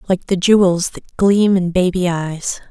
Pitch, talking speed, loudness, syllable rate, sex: 185 Hz, 175 wpm, -16 LUFS, 4.3 syllables/s, female